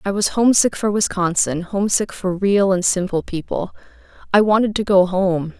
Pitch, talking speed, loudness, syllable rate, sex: 195 Hz, 170 wpm, -18 LUFS, 5.1 syllables/s, female